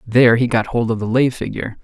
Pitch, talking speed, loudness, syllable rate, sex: 120 Hz, 260 wpm, -17 LUFS, 6.6 syllables/s, male